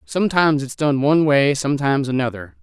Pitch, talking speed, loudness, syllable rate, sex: 145 Hz, 160 wpm, -18 LUFS, 6.4 syllables/s, male